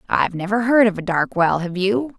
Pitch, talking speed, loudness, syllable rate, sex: 195 Hz, 245 wpm, -19 LUFS, 5.5 syllables/s, female